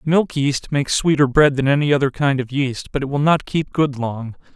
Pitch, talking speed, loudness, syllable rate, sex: 140 Hz, 235 wpm, -18 LUFS, 5.1 syllables/s, male